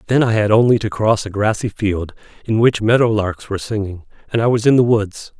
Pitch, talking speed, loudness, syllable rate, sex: 110 Hz, 235 wpm, -16 LUFS, 5.6 syllables/s, male